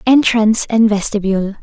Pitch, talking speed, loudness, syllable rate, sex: 220 Hz, 110 wpm, -13 LUFS, 5.4 syllables/s, female